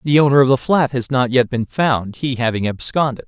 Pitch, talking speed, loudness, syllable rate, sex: 130 Hz, 240 wpm, -17 LUFS, 5.4 syllables/s, male